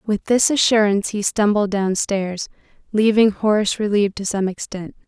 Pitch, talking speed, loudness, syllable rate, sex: 205 Hz, 140 wpm, -18 LUFS, 5.2 syllables/s, female